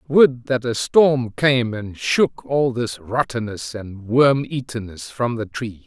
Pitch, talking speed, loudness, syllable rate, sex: 120 Hz, 165 wpm, -20 LUFS, 3.4 syllables/s, male